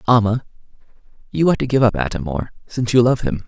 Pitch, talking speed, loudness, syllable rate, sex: 110 Hz, 205 wpm, -18 LUFS, 6.4 syllables/s, male